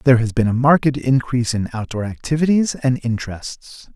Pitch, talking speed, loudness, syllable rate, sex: 125 Hz, 165 wpm, -18 LUFS, 5.4 syllables/s, male